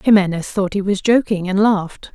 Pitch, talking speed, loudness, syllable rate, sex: 195 Hz, 195 wpm, -17 LUFS, 5.2 syllables/s, female